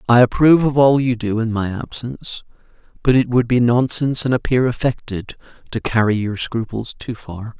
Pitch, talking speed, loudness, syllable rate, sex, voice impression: 120 Hz, 180 wpm, -18 LUFS, 5.3 syllables/s, male, masculine, slightly young, slightly thick, slightly tensed, weak, dark, slightly soft, slightly muffled, slightly fluent, cool, intellectual, refreshing, very sincere, very calm, very friendly, very reassuring, unique, slightly elegant, wild, sweet, lively, kind, slightly modest